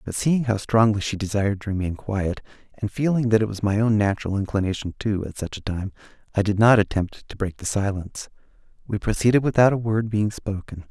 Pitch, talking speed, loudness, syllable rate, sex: 105 Hz, 210 wpm, -23 LUFS, 5.8 syllables/s, male